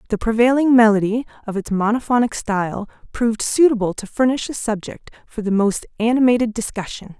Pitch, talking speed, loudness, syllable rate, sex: 225 Hz, 150 wpm, -18 LUFS, 5.8 syllables/s, female